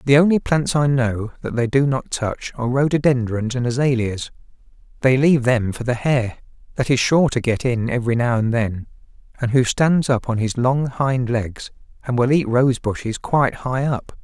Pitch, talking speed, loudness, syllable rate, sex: 125 Hz, 200 wpm, -19 LUFS, 4.9 syllables/s, male